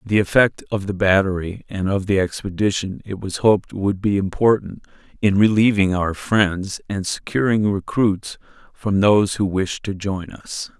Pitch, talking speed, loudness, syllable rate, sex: 100 Hz, 160 wpm, -20 LUFS, 4.5 syllables/s, male